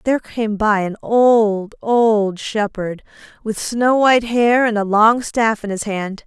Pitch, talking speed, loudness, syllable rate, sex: 220 Hz, 170 wpm, -17 LUFS, 3.7 syllables/s, female